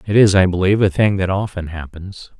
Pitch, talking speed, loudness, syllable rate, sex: 95 Hz, 225 wpm, -16 LUFS, 5.9 syllables/s, male